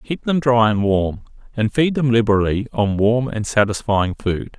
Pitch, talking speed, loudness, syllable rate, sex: 115 Hz, 185 wpm, -18 LUFS, 4.7 syllables/s, male